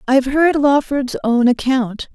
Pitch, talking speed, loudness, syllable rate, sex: 265 Hz, 170 wpm, -16 LUFS, 4.3 syllables/s, female